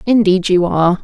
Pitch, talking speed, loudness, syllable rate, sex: 190 Hz, 175 wpm, -13 LUFS, 5.6 syllables/s, female